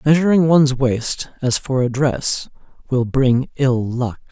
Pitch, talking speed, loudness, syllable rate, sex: 135 Hz, 155 wpm, -18 LUFS, 3.9 syllables/s, male